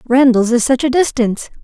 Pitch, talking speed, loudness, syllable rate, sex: 250 Hz, 185 wpm, -14 LUFS, 5.7 syllables/s, female